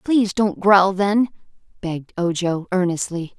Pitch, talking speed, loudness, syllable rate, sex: 190 Hz, 125 wpm, -19 LUFS, 4.5 syllables/s, female